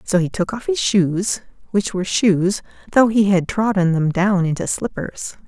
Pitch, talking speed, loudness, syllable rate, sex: 195 Hz, 185 wpm, -19 LUFS, 4.5 syllables/s, female